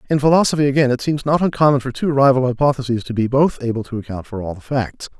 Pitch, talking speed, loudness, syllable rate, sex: 130 Hz, 240 wpm, -18 LUFS, 6.8 syllables/s, male